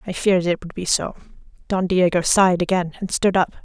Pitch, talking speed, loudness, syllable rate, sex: 180 Hz, 215 wpm, -19 LUFS, 5.9 syllables/s, female